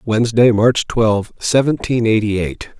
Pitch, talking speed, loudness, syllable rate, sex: 115 Hz, 130 wpm, -16 LUFS, 4.0 syllables/s, male